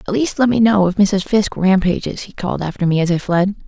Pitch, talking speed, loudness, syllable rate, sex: 195 Hz, 260 wpm, -16 LUFS, 6.2 syllables/s, female